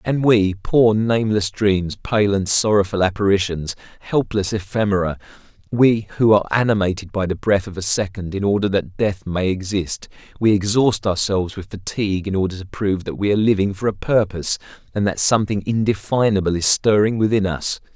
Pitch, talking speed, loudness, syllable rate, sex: 100 Hz, 170 wpm, -19 LUFS, 5.5 syllables/s, male